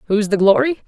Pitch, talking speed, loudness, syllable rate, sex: 220 Hz, 205 wpm, -15 LUFS, 7.4 syllables/s, female